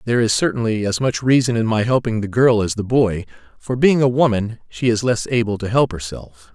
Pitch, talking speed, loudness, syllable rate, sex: 115 Hz, 230 wpm, -18 LUFS, 5.5 syllables/s, male